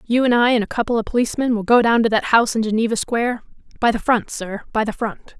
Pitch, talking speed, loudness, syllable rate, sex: 230 Hz, 255 wpm, -19 LUFS, 6.6 syllables/s, female